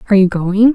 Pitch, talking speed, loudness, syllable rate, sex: 205 Hz, 240 wpm, -13 LUFS, 6.7 syllables/s, female